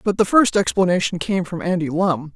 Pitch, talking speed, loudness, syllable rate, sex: 185 Hz, 205 wpm, -19 LUFS, 5.3 syllables/s, female